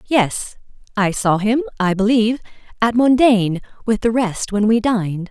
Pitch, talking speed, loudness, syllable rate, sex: 220 Hz, 160 wpm, -17 LUFS, 4.8 syllables/s, female